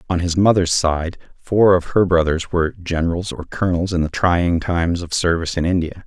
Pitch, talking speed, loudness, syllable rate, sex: 85 Hz, 200 wpm, -18 LUFS, 5.4 syllables/s, male